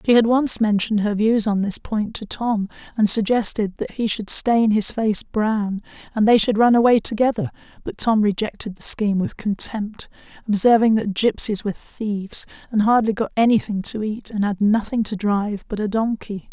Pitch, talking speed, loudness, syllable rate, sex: 215 Hz, 190 wpm, -20 LUFS, 5.0 syllables/s, female